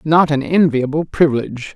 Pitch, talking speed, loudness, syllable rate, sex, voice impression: 150 Hz, 135 wpm, -16 LUFS, 5.5 syllables/s, male, masculine, adult-like, slightly thick, cool, sincere, slightly calm, friendly, slightly kind